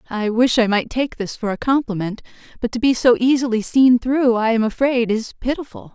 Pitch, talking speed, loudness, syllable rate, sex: 240 Hz, 210 wpm, -18 LUFS, 5.3 syllables/s, female